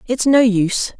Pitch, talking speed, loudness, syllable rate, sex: 230 Hz, 180 wpm, -15 LUFS, 5.0 syllables/s, female